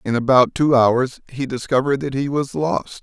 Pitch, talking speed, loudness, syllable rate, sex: 130 Hz, 200 wpm, -18 LUFS, 4.9 syllables/s, male